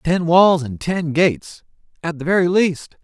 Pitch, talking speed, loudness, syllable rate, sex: 165 Hz, 160 wpm, -17 LUFS, 4.3 syllables/s, male